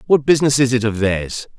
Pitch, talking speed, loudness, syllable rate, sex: 120 Hz, 230 wpm, -16 LUFS, 5.9 syllables/s, male